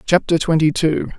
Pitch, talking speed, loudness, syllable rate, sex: 160 Hz, 150 wpm, -17 LUFS, 4.9 syllables/s, male